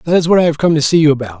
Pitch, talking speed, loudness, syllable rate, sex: 155 Hz, 430 wpm, -12 LUFS, 8.7 syllables/s, male